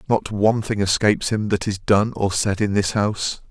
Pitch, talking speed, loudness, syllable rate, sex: 105 Hz, 225 wpm, -20 LUFS, 5.2 syllables/s, male